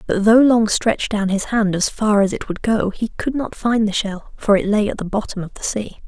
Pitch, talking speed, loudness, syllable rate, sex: 210 Hz, 275 wpm, -18 LUFS, 5.2 syllables/s, female